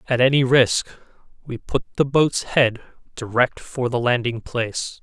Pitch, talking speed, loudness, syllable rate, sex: 125 Hz, 155 wpm, -20 LUFS, 4.5 syllables/s, male